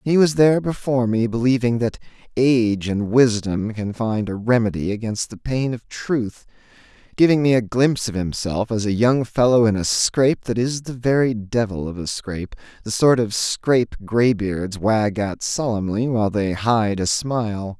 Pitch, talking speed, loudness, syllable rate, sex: 115 Hz, 180 wpm, -20 LUFS, 4.8 syllables/s, male